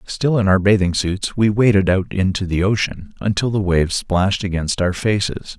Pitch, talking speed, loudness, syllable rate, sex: 95 Hz, 195 wpm, -18 LUFS, 5.0 syllables/s, male